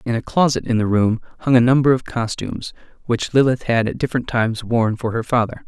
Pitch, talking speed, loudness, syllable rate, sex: 120 Hz, 220 wpm, -19 LUFS, 6.1 syllables/s, male